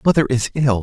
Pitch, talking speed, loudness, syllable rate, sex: 130 Hz, 220 wpm, -18 LUFS, 5.9 syllables/s, male